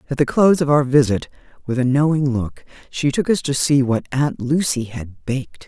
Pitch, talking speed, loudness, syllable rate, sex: 135 Hz, 210 wpm, -18 LUFS, 5.2 syllables/s, female